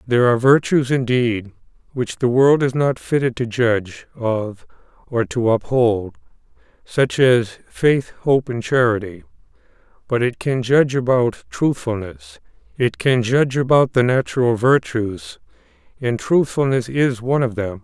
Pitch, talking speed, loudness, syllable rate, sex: 125 Hz, 140 wpm, -18 LUFS, 4.4 syllables/s, male